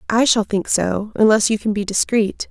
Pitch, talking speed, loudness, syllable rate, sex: 210 Hz, 215 wpm, -17 LUFS, 4.8 syllables/s, female